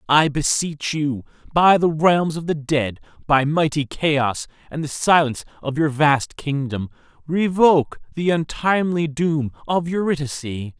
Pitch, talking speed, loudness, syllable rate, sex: 150 Hz, 140 wpm, -20 LUFS, 4.4 syllables/s, male